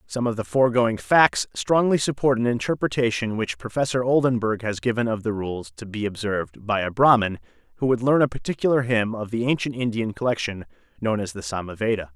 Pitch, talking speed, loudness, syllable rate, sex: 115 Hz, 190 wpm, -23 LUFS, 5.7 syllables/s, male